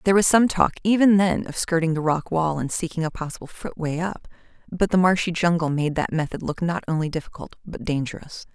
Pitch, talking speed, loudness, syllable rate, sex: 170 Hz, 210 wpm, -22 LUFS, 5.8 syllables/s, female